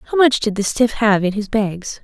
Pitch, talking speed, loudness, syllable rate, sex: 220 Hz, 265 wpm, -17 LUFS, 4.5 syllables/s, female